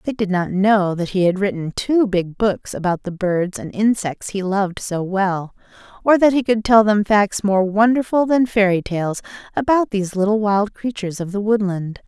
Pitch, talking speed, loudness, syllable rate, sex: 200 Hz, 200 wpm, -18 LUFS, 4.8 syllables/s, female